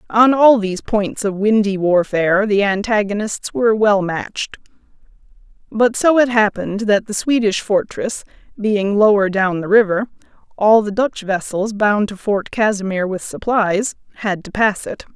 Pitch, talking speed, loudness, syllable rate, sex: 205 Hz, 155 wpm, -17 LUFS, 4.6 syllables/s, female